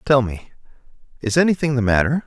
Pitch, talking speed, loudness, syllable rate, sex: 130 Hz, 135 wpm, -19 LUFS, 6.2 syllables/s, male